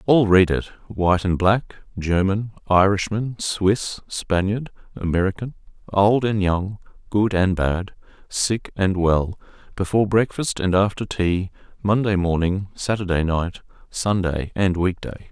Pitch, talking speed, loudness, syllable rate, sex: 95 Hz, 130 wpm, -21 LUFS, 4.2 syllables/s, male